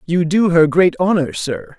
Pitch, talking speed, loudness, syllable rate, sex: 170 Hz, 200 wpm, -15 LUFS, 4.4 syllables/s, male